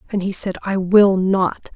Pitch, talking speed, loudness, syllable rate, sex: 190 Hz, 205 wpm, -17 LUFS, 4.6 syllables/s, female